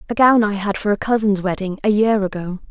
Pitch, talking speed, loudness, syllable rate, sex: 205 Hz, 245 wpm, -18 LUFS, 5.9 syllables/s, female